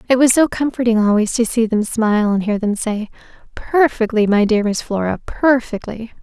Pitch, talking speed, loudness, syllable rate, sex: 225 Hz, 185 wpm, -16 LUFS, 5.1 syllables/s, female